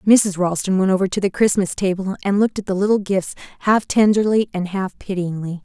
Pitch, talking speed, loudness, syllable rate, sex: 195 Hz, 200 wpm, -19 LUFS, 5.7 syllables/s, female